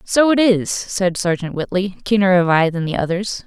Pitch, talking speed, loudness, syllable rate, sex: 190 Hz, 210 wpm, -17 LUFS, 4.9 syllables/s, female